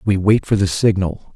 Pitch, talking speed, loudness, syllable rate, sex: 100 Hz, 220 wpm, -17 LUFS, 5.0 syllables/s, male